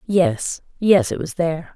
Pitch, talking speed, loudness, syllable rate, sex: 175 Hz, 100 wpm, -20 LUFS, 4.1 syllables/s, female